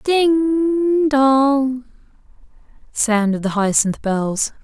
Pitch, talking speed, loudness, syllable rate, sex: 260 Hz, 80 wpm, -17 LUFS, 2.4 syllables/s, female